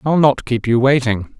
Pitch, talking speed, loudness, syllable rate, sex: 125 Hz, 215 wpm, -16 LUFS, 4.7 syllables/s, male